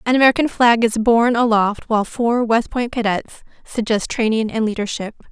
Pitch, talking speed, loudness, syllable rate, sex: 230 Hz, 170 wpm, -18 LUFS, 5.5 syllables/s, female